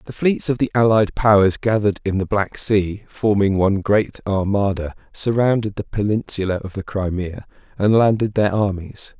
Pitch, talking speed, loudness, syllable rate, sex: 100 Hz, 165 wpm, -19 LUFS, 4.8 syllables/s, male